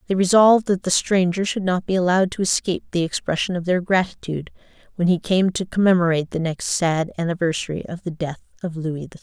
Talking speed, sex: 210 wpm, female